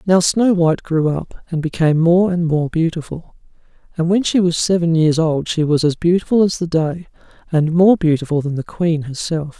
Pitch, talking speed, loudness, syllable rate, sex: 165 Hz, 200 wpm, -17 LUFS, 5.1 syllables/s, male